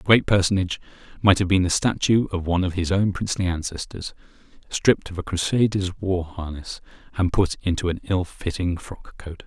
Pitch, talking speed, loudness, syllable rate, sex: 90 Hz, 185 wpm, -23 LUFS, 5.5 syllables/s, male